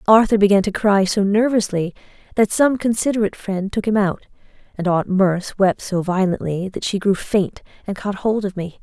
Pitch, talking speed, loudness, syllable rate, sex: 200 Hz, 190 wpm, -19 LUFS, 5.2 syllables/s, female